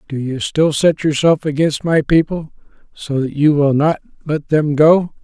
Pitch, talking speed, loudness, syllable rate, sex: 150 Hz, 185 wpm, -16 LUFS, 4.4 syllables/s, male